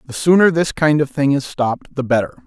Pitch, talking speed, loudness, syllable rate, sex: 140 Hz, 245 wpm, -16 LUFS, 5.6 syllables/s, male